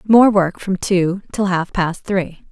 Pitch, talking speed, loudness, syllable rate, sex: 185 Hz, 190 wpm, -17 LUFS, 3.6 syllables/s, female